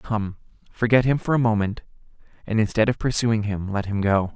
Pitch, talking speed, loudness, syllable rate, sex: 110 Hz, 195 wpm, -22 LUFS, 5.3 syllables/s, male